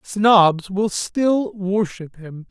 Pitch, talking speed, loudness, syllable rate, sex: 195 Hz, 120 wpm, -18 LUFS, 2.5 syllables/s, male